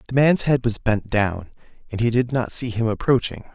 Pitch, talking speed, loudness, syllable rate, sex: 115 Hz, 220 wpm, -21 LUFS, 5.2 syllables/s, male